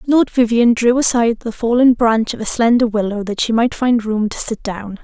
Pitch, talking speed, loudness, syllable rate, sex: 230 Hz, 225 wpm, -15 LUFS, 5.3 syllables/s, female